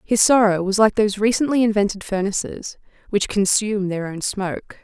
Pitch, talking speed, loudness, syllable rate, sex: 205 Hz, 160 wpm, -19 LUFS, 5.5 syllables/s, female